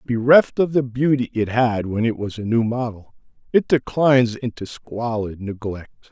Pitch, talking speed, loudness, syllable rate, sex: 120 Hz, 165 wpm, -20 LUFS, 4.6 syllables/s, male